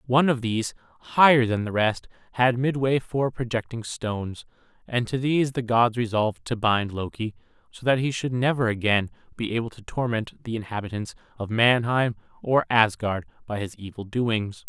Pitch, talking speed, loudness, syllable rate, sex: 115 Hz, 170 wpm, -24 LUFS, 5.2 syllables/s, male